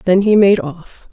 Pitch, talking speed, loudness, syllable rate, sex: 185 Hz, 215 wpm, -12 LUFS, 4.1 syllables/s, female